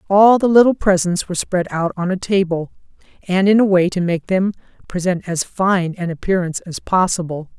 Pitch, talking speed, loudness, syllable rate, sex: 185 Hz, 190 wpm, -17 LUFS, 5.3 syllables/s, female